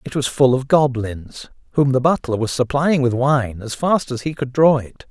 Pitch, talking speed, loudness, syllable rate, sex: 135 Hz, 225 wpm, -18 LUFS, 4.7 syllables/s, male